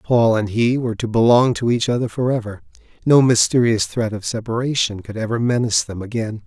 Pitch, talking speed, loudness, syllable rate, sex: 115 Hz, 185 wpm, -18 LUFS, 5.7 syllables/s, male